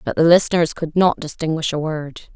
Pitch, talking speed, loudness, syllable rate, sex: 160 Hz, 205 wpm, -18 LUFS, 5.4 syllables/s, female